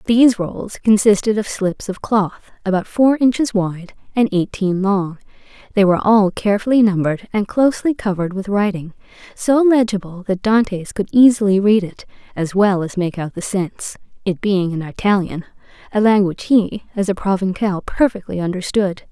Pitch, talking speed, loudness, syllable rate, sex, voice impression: 200 Hz, 155 wpm, -17 LUFS, 5.1 syllables/s, female, very feminine, slightly adult-like, slightly cute, slightly sweet